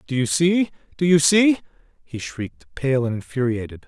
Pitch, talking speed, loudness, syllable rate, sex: 150 Hz, 170 wpm, -20 LUFS, 5.1 syllables/s, male